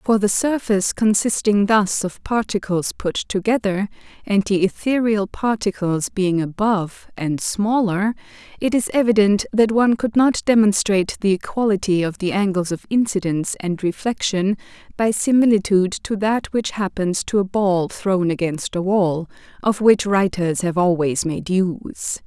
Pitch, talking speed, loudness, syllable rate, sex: 200 Hz, 145 wpm, -19 LUFS, 4.6 syllables/s, female